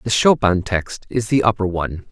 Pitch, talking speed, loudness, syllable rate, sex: 100 Hz, 200 wpm, -18 LUFS, 5.1 syllables/s, male